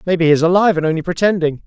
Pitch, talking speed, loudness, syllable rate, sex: 170 Hz, 250 wpm, -15 LUFS, 8.4 syllables/s, male